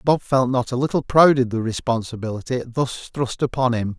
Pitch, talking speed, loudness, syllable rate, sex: 125 Hz, 195 wpm, -21 LUFS, 5.2 syllables/s, male